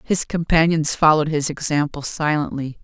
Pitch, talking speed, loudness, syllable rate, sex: 155 Hz, 125 wpm, -19 LUFS, 5.2 syllables/s, female